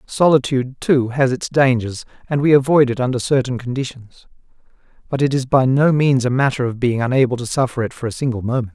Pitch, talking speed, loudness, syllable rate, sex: 130 Hz, 205 wpm, -17 LUFS, 5.9 syllables/s, male